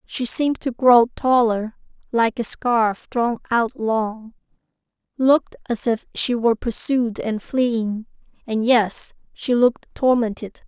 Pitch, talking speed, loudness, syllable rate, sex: 235 Hz, 130 wpm, -20 LUFS, 3.8 syllables/s, female